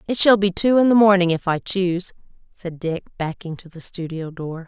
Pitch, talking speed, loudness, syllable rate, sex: 180 Hz, 220 wpm, -19 LUFS, 5.2 syllables/s, female